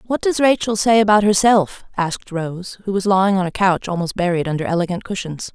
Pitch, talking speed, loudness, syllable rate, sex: 190 Hz, 205 wpm, -18 LUFS, 5.8 syllables/s, female